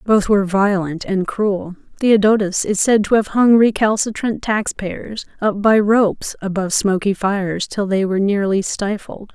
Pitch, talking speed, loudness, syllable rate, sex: 200 Hz, 160 wpm, -17 LUFS, 4.6 syllables/s, female